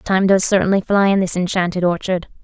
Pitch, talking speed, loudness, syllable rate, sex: 185 Hz, 195 wpm, -17 LUFS, 5.7 syllables/s, female